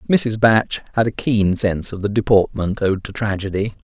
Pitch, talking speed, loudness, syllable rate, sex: 105 Hz, 185 wpm, -19 LUFS, 4.9 syllables/s, male